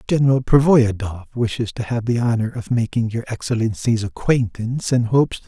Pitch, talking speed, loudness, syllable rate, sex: 115 Hz, 155 wpm, -19 LUFS, 5.4 syllables/s, male